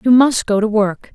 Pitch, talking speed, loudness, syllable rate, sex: 220 Hz, 265 wpm, -15 LUFS, 4.8 syllables/s, female